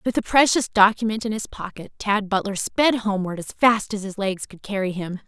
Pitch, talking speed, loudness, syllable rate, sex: 205 Hz, 215 wpm, -22 LUFS, 5.3 syllables/s, female